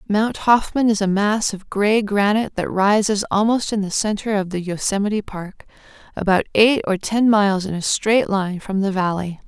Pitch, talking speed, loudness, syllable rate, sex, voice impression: 205 Hz, 190 wpm, -19 LUFS, 4.9 syllables/s, female, very feminine, adult-like, slightly soft, slightly intellectual, slightly calm, slightly kind